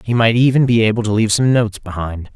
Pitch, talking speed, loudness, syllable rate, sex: 110 Hz, 255 wpm, -15 LUFS, 6.7 syllables/s, male